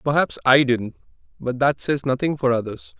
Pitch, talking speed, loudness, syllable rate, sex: 135 Hz, 180 wpm, -21 LUFS, 5.1 syllables/s, male